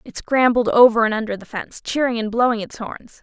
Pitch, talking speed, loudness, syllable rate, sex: 230 Hz, 225 wpm, -18 LUFS, 5.8 syllables/s, female